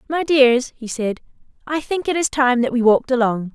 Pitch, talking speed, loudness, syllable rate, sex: 255 Hz, 220 wpm, -18 LUFS, 5.3 syllables/s, female